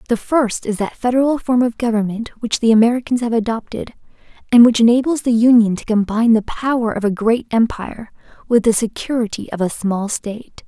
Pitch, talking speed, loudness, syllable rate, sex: 230 Hz, 185 wpm, -16 LUFS, 5.7 syllables/s, female